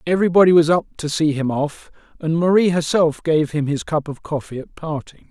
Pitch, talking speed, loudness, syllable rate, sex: 155 Hz, 205 wpm, -19 LUFS, 5.5 syllables/s, male